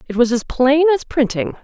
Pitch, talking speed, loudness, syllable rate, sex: 260 Hz, 220 wpm, -16 LUFS, 4.8 syllables/s, female